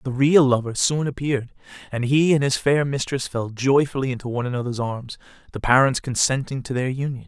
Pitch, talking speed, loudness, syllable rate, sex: 130 Hz, 190 wpm, -21 LUFS, 5.7 syllables/s, male